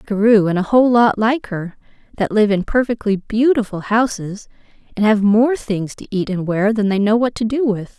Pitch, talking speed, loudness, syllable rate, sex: 215 Hz, 205 wpm, -17 LUFS, 5.0 syllables/s, female